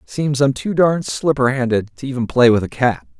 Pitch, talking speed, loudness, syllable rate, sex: 125 Hz, 205 wpm, -17 LUFS, 5.5 syllables/s, male